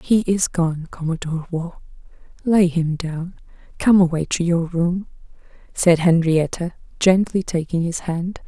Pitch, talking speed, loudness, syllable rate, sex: 170 Hz, 135 wpm, -20 LUFS, 4.3 syllables/s, female